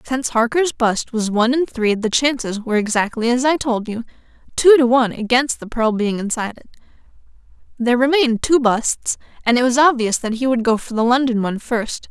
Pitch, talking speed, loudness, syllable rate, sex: 240 Hz, 200 wpm, -18 LUFS, 5.7 syllables/s, female